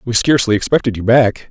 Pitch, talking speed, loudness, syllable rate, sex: 115 Hz, 200 wpm, -14 LUFS, 6.5 syllables/s, male